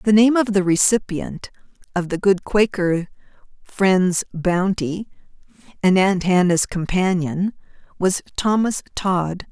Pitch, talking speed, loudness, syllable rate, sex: 190 Hz, 115 wpm, -19 LUFS, 3.8 syllables/s, female